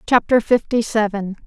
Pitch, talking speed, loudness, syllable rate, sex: 220 Hz, 125 wpm, -18 LUFS, 4.8 syllables/s, female